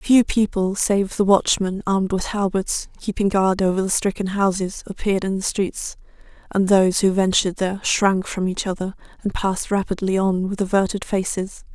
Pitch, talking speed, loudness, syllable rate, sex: 195 Hz, 175 wpm, -21 LUFS, 5.2 syllables/s, female